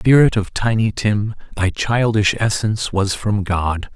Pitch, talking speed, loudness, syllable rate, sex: 105 Hz, 150 wpm, -18 LUFS, 4.1 syllables/s, male